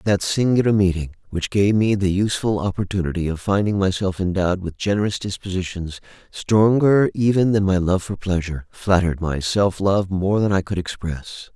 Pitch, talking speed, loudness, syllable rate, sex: 95 Hz, 165 wpm, -20 LUFS, 5.4 syllables/s, male